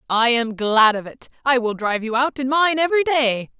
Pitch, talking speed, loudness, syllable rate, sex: 250 Hz, 235 wpm, -19 LUFS, 5.3 syllables/s, female